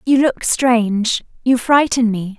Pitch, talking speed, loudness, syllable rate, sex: 240 Hz, 150 wpm, -16 LUFS, 3.9 syllables/s, female